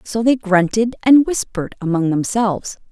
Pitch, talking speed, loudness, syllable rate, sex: 210 Hz, 145 wpm, -17 LUFS, 5.0 syllables/s, female